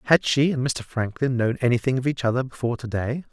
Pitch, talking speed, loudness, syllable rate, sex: 125 Hz, 235 wpm, -23 LUFS, 6.2 syllables/s, male